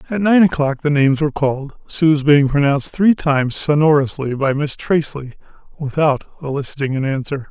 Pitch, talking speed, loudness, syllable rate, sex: 145 Hz, 160 wpm, -17 LUFS, 5.6 syllables/s, male